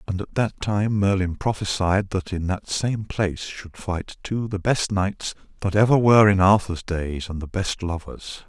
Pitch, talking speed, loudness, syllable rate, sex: 95 Hz, 190 wpm, -22 LUFS, 4.4 syllables/s, male